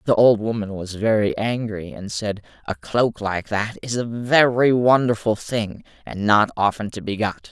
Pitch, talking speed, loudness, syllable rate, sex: 110 Hz, 185 wpm, -21 LUFS, 4.4 syllables/s, male